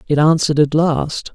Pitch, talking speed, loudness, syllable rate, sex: 150 Hz, 180 wpm, -16 LUFS, 5.0 syllables/s, male